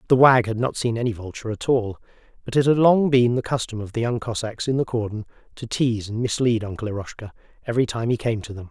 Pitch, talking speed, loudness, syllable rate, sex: 115 Hz, 240 wpm, -22 LUFS, 6.5 syllables/s, male